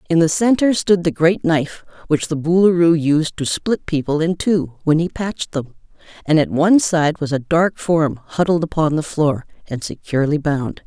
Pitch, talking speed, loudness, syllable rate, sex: 160 Hz, 195 wpm, -18 LUFS, 4.9 syllables/s, female